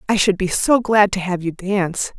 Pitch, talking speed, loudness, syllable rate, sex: 195 Hz, 245 wpm, -18 LUFS, 5.1 syllables/s, female